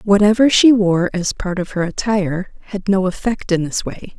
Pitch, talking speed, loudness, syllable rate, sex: 195 Hz, 200 wpm, -17 LUFS, 4.9 syllables/s, female